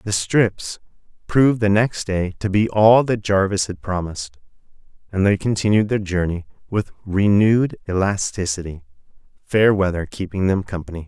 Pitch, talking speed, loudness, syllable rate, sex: 100 Hz, 140 wpm, -19 LUFS, 5.0 syllables/s, male